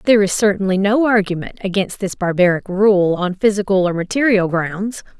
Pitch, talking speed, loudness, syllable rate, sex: 195 Hz, 160 wpm, -17 LUFS, 5.3 syllables/s, female